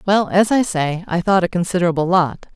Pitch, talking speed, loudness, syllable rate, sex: 180 Hz, 210 wpm, -17 LUFS, 5.5 syllables/s, female